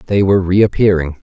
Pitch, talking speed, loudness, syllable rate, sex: 95 Hz, 140 wpm, -13 LUFS, 5.1 syllables/s, male